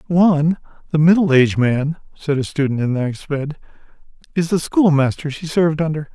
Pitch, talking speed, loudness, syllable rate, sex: 155 Hz, 155 wpm, -18 LUFS, 5.8 syllables/s, male